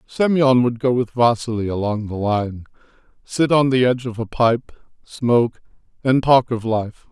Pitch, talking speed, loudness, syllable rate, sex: 120 Hz, 170 wpm, -19 LUFS, 4.6 syllables/s, male